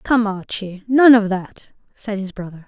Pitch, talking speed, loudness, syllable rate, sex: 210 Hz, 180 wpm, -17 LUFS, 4.4 syllables/s, female